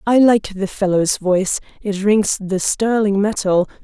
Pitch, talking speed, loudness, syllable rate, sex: 200 Hz, 155 wpm, -17 LUFS, 4.2 syllables/s, female